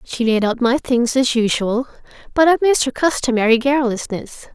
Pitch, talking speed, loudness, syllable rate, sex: 250 Hz, 170 wpm, -17 LUFS, 5.4 syllables/s, female